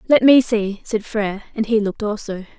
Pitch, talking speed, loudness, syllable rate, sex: 215 Hz, 210 wpm, -18 LUFS, 5.7 syllables/s, female